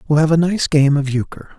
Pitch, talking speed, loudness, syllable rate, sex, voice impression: 150 Hz, 265 wpm, -16 LUFS, 5.9 syllables/s, male, very masculine, middle-aged, thick, very relaxed, very weak, dark, very soft, very muffled, slightly fluent, very raspy, slightly cool, intellectual, very sincere, very calm, very mature, friendly, slightly reassuring, very unique, elegant, slightly wild, very sweet, very kind, very modest